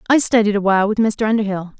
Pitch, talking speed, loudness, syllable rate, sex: 210 Hz, 200 wpm, -17 LUFS, 7.0 syllables/s, female